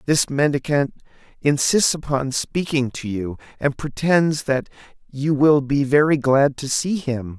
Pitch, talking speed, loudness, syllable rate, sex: 140 Hz, 145 wpm, -20 LUFS, 4.0 syllables/s, male